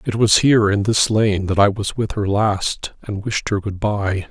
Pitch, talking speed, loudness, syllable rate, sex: 105 Hz, 235 wpm, -18 LUFS, 4.4 syllables/s, male